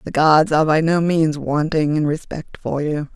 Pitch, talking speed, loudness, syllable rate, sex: 155 Hz, 210 wpm, -18 LUFS, 4.6 syllables/s, female